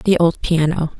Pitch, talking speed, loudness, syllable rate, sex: 165 Hz, 180 wpm, -17 LUFS, 4.4 syllables/s, female